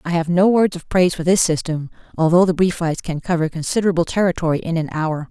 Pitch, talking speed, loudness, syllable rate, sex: 170 Hz, 215 wpm, -18 LUFS, 6.6 syllables/s, female